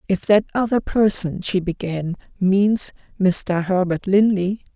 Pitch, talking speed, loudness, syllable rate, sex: 190 Hz, 125 wpm, -20 LUFS, 3.9 syllables/s, female